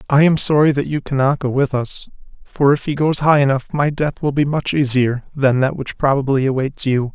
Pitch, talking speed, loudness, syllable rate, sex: 140 Hz, 225 wpm, -17 LUFS, 5.2 syllables/s, male